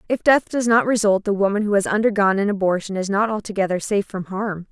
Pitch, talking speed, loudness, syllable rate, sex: 205 Hz, 230 wpm, -20 LUFS, 6.4 syllables/s, female